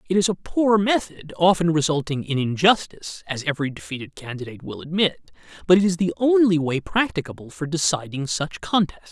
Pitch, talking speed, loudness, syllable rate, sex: 165 Hz, 170 wpm, -22 LUFS, 4.5 syllables/s, male